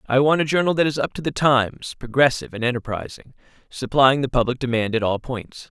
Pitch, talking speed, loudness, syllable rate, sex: 130 Hz, 205 wpm, -20 LUFS, 6.0 syllables/s, male